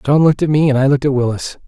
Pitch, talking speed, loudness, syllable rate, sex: 140 Hz, 325 wpm, -14 LUFS, 7.6 syllables/s, male